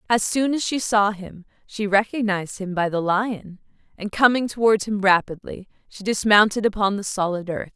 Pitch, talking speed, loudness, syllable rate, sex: 205 Hz, 180 wpm, -21 LUFS, 5.0 syllables/s, female